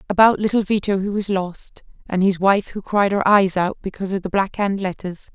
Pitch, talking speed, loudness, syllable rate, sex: 195 Hz, 225 wpm, -19 LUFS, 5.4 syllables/s, female